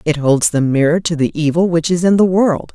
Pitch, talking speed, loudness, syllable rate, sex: 165 Hz, 260 wpm, -14 LUFS, 5.3 syllables/s, female